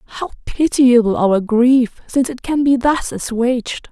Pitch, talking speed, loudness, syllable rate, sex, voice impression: 250 Hz, 155 wpm, -15 LUFS, 4.5 syllables/s, female, feminine, adult-like, relaxed, slightly powerful, soft, slightly raspy, intellectual, calm, slightly lively, strict, sharp